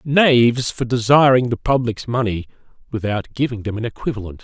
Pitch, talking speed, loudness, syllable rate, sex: 120 Hz, 150 wpm, -18 LUFS, 5.4 syllables/s, male